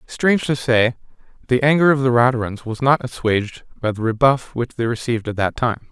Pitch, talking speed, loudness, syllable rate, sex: 120 Hz, 205 wpm, -19 LUFS, 5.6 syllables/s, male